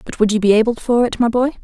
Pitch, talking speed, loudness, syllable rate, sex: 230 Hz, 330 wpm, -16 LUFS, 6.7 syllables/s, female